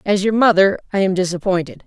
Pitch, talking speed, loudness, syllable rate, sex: 185 Hz, 195 wpm, -17 LUFS, 6.2 syllables/s, female